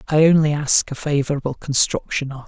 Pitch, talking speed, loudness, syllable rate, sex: 145 Hz, 170 wpm, -19 LUFS, 5.6 syllables/s, male